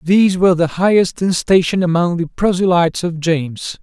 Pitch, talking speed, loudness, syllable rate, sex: 175 Hz, 175 wpm, -15 LUFS, 5.5 syllables/s, male